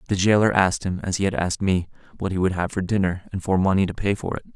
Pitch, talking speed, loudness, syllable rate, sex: 95 Hz, 290 wpm, -22 LUFS, 7.1 syllables/s, male